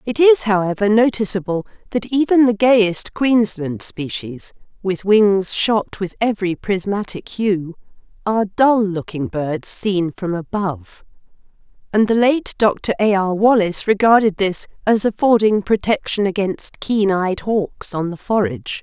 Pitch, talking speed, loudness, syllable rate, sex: 200 Hz, 135 wpm, -18 LUFS, 4.3 syllables/s, female